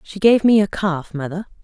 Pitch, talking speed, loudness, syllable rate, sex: 190 Hz, 220 wpm, -18 LUFS, 5.0 syllables/s, female